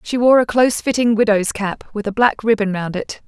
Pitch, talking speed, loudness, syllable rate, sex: 220 Hz, 240 wpm, -17 LUFS, 5.5 syllables/s, female